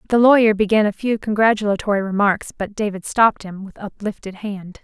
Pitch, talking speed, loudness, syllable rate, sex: 205 Hz, 175 wpm, -18 LUFS, 5.7 syllables/s, female